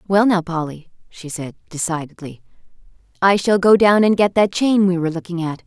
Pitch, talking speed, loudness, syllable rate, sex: 180 Hz, 190 wpm, -17 LUFS, 5.5 syllables/s, female